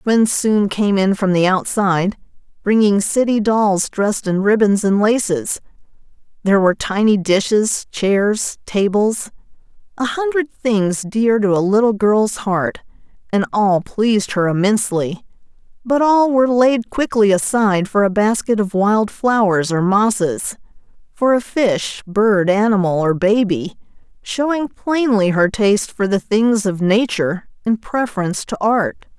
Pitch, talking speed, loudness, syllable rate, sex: 210 Hz, 140 wpm, -16 LUFS, 4.3 syllables/s, female